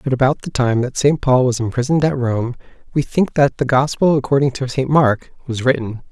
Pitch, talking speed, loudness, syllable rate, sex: 130 Hz, 215 wpm, -17 LUFS, 5.5 syllables/s, male